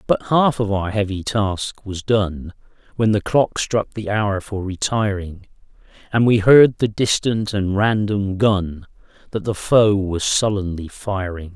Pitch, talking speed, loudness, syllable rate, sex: 100 Hz, 155 wpm, -19 LUFS, 3.9 syllables/s, male